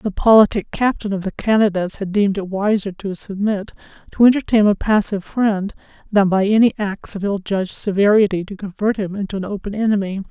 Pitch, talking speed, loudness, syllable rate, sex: 200 Hz, 185 wpm, -18 LUFS, 5.8 syllables/s, female